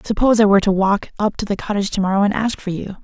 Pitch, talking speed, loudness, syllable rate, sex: 205 Hz, 275 wpm, -18 LUFS, 7.4 syllables/s, female